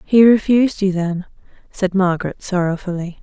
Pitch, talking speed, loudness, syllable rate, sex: 190 Hz, 130 wpm, -17 LUFS, 5.3 syllables/s, female